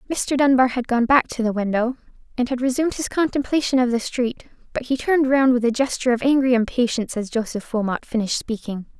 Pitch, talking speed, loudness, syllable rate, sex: 250 Hz, 205 wpm, -21 LUFS, 6.2 syllables/s, female